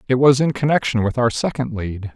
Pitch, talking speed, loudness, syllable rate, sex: 125 Hz, 225 wpm, -19 LUFS, 5.6 syllables/s, male